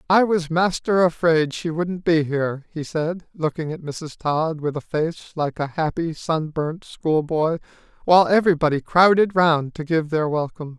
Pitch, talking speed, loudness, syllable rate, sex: 160 Hz, 165 wpm, -21 LUFS, 4.6 syllables/s, male